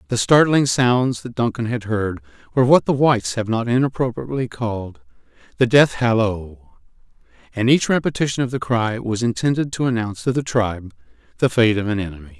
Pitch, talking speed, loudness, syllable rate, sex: 115 Hz, 175 wpm, -19 LUFS, 5.6 syllables/s, male